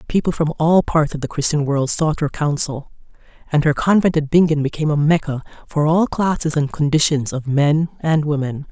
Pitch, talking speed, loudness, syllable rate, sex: 150 Hz, 195 wpm, -18 LUFS, 5.3 syllables/s, female